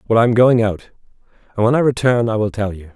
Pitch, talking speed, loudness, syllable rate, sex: 110 Hz, 265 wpm, -16 LUFS, 6.6 syllables/s, male